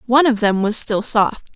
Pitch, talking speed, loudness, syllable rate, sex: 225 Hz, 230 wpm, -17 LUFS, 5.1 syllables/s, female